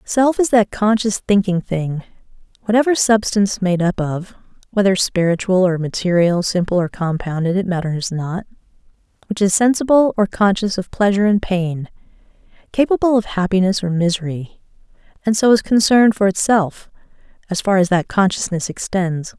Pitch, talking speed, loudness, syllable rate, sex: 195 Hz, 140 wpm, -17 LUFS, 4.1 syllables/s, female